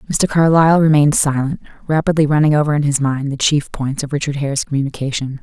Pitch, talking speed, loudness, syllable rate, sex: 145 Hz, 190 wpm, -16 LUFS, 6.4 syllables/s, female